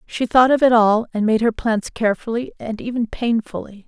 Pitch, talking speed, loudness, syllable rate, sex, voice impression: 225 Hz, 200 wpm, -18 LUFS, 5.3 syllables/s, female, feminine, adult-like, tensed, powerful, bright, clear, fluent, intellectual, elegant, lively, slightly strict